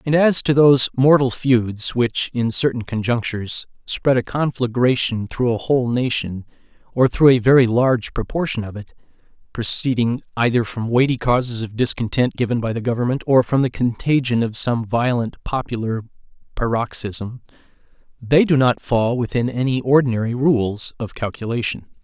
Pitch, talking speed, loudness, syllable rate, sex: 120 Hz, 150 wpm, -19 LUFS, 5.0 syllables/s, male